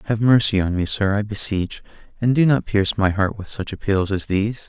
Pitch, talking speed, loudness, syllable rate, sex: 105 Hz, 230 wpm, -20 LUFS, 5.6 syllables/s, male